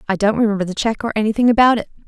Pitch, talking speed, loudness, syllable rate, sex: 215 Hz, 260 wpm, -17 LUFS, 8.6 syllables/s, female